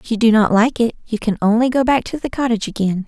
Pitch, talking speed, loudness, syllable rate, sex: 230 Hz, 295 wpm, -17 LUFS, 6.7 syllables/s, female